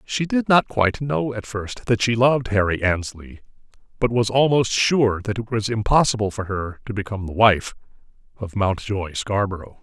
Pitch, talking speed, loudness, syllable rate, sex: 105 Hz, 175 wpm, -21 LUFS, 5.1 syllables/s, male